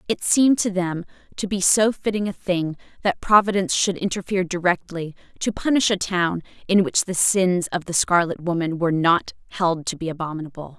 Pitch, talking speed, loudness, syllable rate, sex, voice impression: 180 Hz, 185 wpm, -21 LUFS, 5.5 syllables/s, female, very feminine, slightly young, very thin, very tensed, very powerful, very bright, slightly soft, very clear, very fluent, very cute, slightly intellectual, very refreshing, slightly sincere, slightly calm, very friendly, slightly reassuring, very unique, elegant, very wild, sweet, lively, strict, intense, very sharp, very light